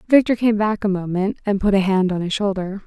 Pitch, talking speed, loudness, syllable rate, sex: 200 Hz, 250 wpm, -19 LUFS, 5.8 syllables/s, female